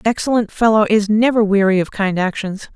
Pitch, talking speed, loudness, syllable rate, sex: 210 Hz, 195 wpm, -16 LUFS, 5.7 syllables/s, female